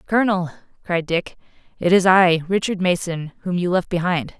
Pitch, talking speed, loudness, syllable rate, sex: 180 Hz, 165 wpm, -19 LUFS, 5.2 syllables/s, female